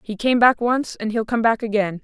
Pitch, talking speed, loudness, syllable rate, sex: 225 Hz, 265 wpm, -19 LUFS, 5.2 syllables/s, female